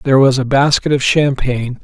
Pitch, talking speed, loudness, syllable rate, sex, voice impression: 135 Hz, 195 wpm, -14 LUFS, 5.9 syllables/s, male, masculine, middle-aged, slightly weak, raspy, calm, mature, friendly, wild, kind, slightly modest